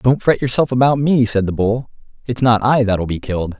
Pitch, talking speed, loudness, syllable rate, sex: 115 Hz, 235 wpm, -16 LUFS, 5.3 syllables/s, male